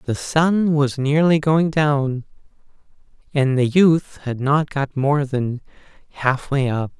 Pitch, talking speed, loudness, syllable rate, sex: 140 Hz, 135 wpm, -19 LUFS, 3.5 syllables/s, male